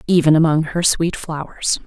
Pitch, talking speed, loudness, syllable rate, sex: 160 Hz, 160 wpm, -17 LUFS, 4.8 syllables/s, female